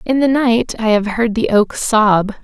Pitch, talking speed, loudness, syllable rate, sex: 225 Hz, 220 wpm, -15 LUFS, 4.0 syllables/s, female